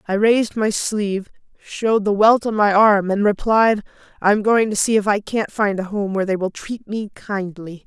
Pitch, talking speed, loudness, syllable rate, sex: 205 Hz, 220 wpm, -18 LUFS, 5.1 syllables/s, female